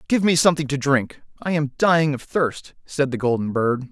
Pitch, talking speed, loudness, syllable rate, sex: 145 Hz, 215 wpm, -20 LUFS, 5.3 syllables/s, male